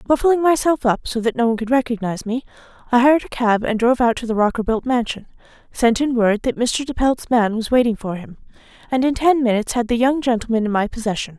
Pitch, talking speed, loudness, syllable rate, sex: 240 Hz, 230 wpm, -18 LUFS, 6.4 syllables/s, female